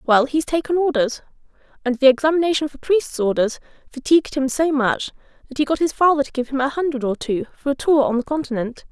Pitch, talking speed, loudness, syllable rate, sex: 280 Hz, 215 wpm, -20 LUFS, 6.0 syllables/s, female